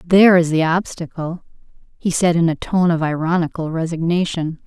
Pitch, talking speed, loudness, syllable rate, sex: 170 Hz, 155 wpm, -18 LUFS, 5.3 syllables/s, female